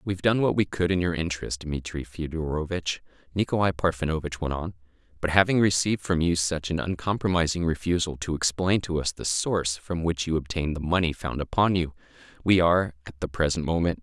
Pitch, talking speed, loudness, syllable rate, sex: 85 Hz, 190 wpm, -26 LUFS, 5.9 syllables/s, male